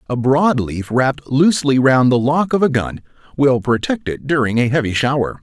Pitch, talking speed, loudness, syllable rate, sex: 135 Hz, 200 wpm, -16 LUFS, 5.0 syllables/s, male